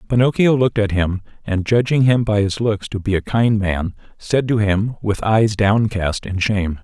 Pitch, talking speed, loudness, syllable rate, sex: 105 Hz, 200 wpm, -18 LUFS, 4.7 syllables/s, male